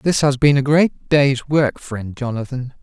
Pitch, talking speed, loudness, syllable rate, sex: 135 Hz, 190 wpm, -17 LUFS, 4.0 syllables/s, male